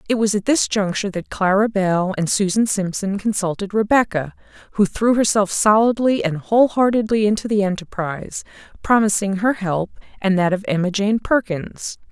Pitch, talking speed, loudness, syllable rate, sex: 205 Hz, 155 wpm, -19 LUFS, 5.2 syllables/s, female